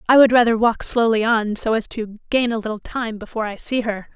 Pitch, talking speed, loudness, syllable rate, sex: 225 Hz, 245 wpm, -19 LUFS, 5.7 syllables/s, female